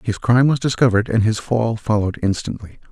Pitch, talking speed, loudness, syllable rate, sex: 115 Hz, 185 wpm, -18 LUFS, 6.3 syllables/s, male